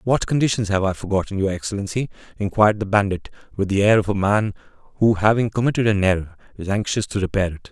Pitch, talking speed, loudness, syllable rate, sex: 100 Hz, 200 wpm, -20 LUFS, 6.6 syllables/s, male